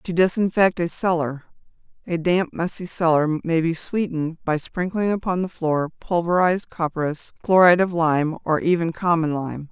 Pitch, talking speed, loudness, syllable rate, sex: 170 Hz, 150 wpm, -21 LUFS, 4.9 syllables/s, female